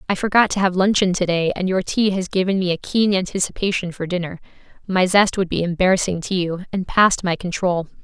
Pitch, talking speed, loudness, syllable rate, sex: 185 Hz, 215 wpm, -19 LUFS, 5.8 syllables/s, female